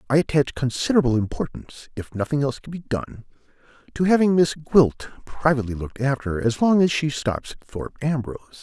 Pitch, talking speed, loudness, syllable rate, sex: 135 Hz, 160 wpm, -22 LUFS, 6.3 syllables/s, male